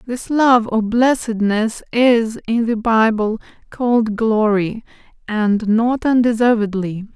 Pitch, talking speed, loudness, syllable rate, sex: 225 Hz, 110 wpm, -17 LUFS, 3.7 syllables/s, female